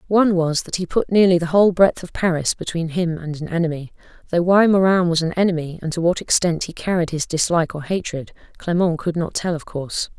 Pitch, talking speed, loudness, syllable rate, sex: 170 Hz, 225 wpm, -19 LUFS, 5.9 syllables/s, female